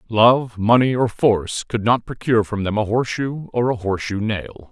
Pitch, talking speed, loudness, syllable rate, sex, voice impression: 110 Hz, 190 wpm, -19 LUFS, 5.2 syllables/s, male, masculine, adult-like, thick, powerful, bright, slightly muffled, slightly raspy, cool, intellectual, mature, wild, lively, strict